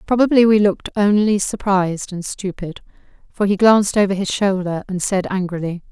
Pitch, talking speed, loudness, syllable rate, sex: 195 Hz, 160 wpm, -17 LUFS, 5.4 syllables/s, female